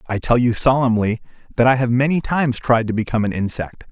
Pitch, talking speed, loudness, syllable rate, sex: 120 Hz, 215 wpm, -18 LUFS, 6.4 syllables/s, male